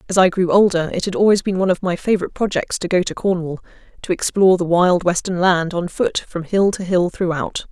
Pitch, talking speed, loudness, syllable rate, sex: 180 Hz, 235 wpm, -18 LUFS, 5.9 syllables/s, female